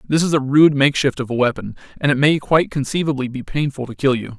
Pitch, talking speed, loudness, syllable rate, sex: 140 Hz, 245 wpm, -18 LUFS, 6.4 syllables/s, male